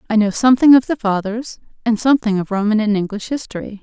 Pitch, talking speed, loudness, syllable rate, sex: 220 Hz, 205 wpm, -16 LUFS, 6.5 syllables/s, female